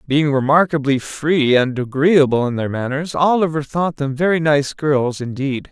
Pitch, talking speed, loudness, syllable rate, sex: 145 Hz, 155 wpm, -17 LUFS, 4.5 syllables/s, male